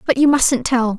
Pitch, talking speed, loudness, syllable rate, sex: 255 Hz, 245 wpm, -15 LUFS, 4.6 syllables/s, female